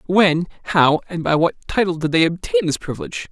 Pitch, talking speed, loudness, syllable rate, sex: 165 Hz, 200 wpm, -19 LUFS, 6.0 syllables/s, male